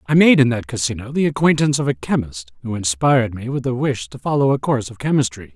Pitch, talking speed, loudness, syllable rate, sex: 125 Hz, 240 wpm, -18 LUFS, 6.4 syllables/s, male